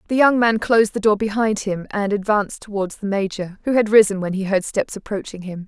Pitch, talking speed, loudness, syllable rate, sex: 205 Hz, 235 wpm, -19 LUFS, 5.8 syllables/s, female